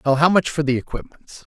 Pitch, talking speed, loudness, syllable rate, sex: 150 Hz, 235 wpm, -19 LUFS, 5.9 syllables/s, male